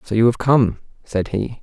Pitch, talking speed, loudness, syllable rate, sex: 115 Hz, 220 wpm, -19 LUFS, 4.6 syllables/s, male